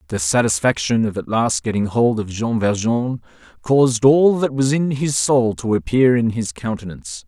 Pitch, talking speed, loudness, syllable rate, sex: 115 Hz, 180 wpm, -18 LUFS, 4.8 syllables/s, male